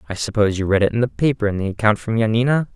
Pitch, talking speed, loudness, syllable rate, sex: 110 Hz, 285 wpm, -19 LUFS, 7.6 syllables/s, male